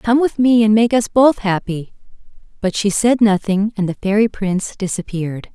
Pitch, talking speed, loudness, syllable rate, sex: 210 Hz, 185 wpm, -16 LUFS, 5.0 syllables/s, female